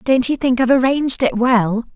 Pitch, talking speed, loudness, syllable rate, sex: 250 Hz, 215 wpm, -16 LUFS, 5.7 syllables/s, female